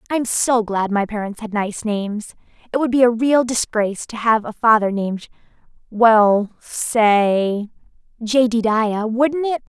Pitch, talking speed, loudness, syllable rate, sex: 225 Hz, 140 wpm, -18 LUFS, 4.1 syllables/s, female